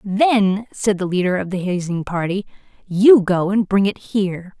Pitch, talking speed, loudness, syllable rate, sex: 195 Hz, 185 wpm, -18 LUFS, 4.5 syllables/s, female